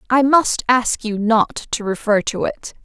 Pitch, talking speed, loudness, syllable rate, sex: 230 Hz, 190 wpm, -18 LUFS, 4.0 syllables/s, female